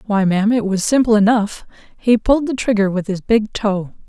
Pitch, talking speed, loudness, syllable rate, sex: 215 Hz, 205 wpm, -17 LUFS, 5.1 syllables/s, female